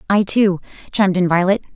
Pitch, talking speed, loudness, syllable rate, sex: 190 Hz, 170 wpm, -17 LUFS, 6.0 syllables/s, female